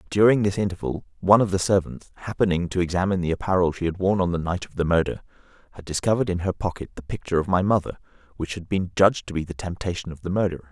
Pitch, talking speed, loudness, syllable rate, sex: 90 Hz, 235 wpm, -23 LUFS, 7.2 syllables/s, male